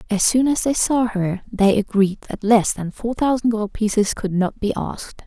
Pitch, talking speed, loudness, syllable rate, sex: 215 Hz, 215 wpm, -20 LUFS, 4.8 syllables/s, female